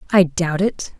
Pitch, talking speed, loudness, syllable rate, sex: 180 Hz, 180 wpm, -19 LUFS, 4.0 syllables/s, female